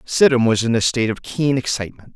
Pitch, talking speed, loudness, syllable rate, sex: 125 Hz, 225 wpm, -18 LUFS, 6.3 syllables/s, male